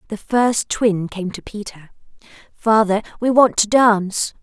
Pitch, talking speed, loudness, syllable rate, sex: 210 Hz, 150 wpm, -17 LUFS, 4.2 syllables/s, female